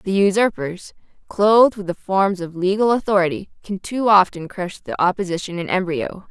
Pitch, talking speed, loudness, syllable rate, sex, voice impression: 190 Hz, 160 wpm, -19 LUFS, 5.0 syllables/s, female, very feminine, slightly young, thin, slightly tensed, slightly powerful, dark, hard, clear, fluent, slightly raspy, cute, intellectual, refreshing, sincere, very calm, very friendly, very reassuring, unique, very elegant, wild, very sweet, lively, kind, slightly intense, slightly sharp, modest, slightly light